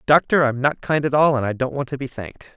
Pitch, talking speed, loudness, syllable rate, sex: 135 Hz, 305 wpm, -20 LUFS, 6.2 syllables/s, male